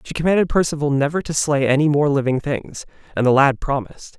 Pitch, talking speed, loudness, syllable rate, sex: 145 Hz, 200 wpm, -18 LUFS, 6.1 syllables/s, male